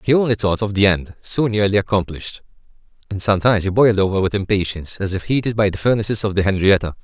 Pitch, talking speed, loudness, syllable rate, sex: 100 Hz, 215 wpm, -18 LUFS, 7.0 syllables/s, male